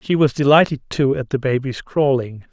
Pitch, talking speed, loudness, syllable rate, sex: 135 Hz, 190 wpm, -18 LUFS, 5.0 syllables/s, male